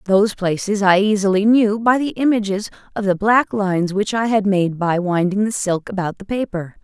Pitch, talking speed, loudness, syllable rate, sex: 200 Hz, 200 wpm, -18 LUFS, 5.1 syllables/s, female